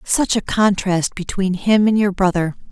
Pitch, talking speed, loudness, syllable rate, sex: 195 Hz, 175 wpm, -17 LUFS, 4.4 syllables/s, female